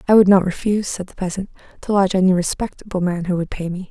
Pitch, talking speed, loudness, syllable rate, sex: 185 Hz, 245 wpm, -19 LUFS, 7.0 syllables/s, female